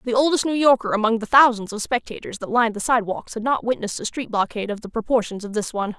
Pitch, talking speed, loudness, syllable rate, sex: 230 Hz, 250 wpm, -21 LUFS, 7.0 syllables/s, female